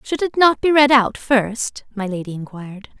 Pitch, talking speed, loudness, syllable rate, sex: 235 Hz, 200 wpm, -17 LUFS, 4.8 syllables/s, female